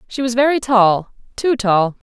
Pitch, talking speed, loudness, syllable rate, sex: 230 Hz, 140 wpm, -16 LUFS, 4.6 syllables/s, female